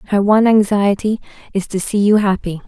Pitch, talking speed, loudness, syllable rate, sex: 200 Hz, 180 wpm, -15 LUFS, 5.9 syllables/s, female